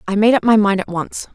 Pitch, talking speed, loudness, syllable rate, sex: 205 Hz, 315 wpm, -15 LUFS, 6.0 syllables/s, female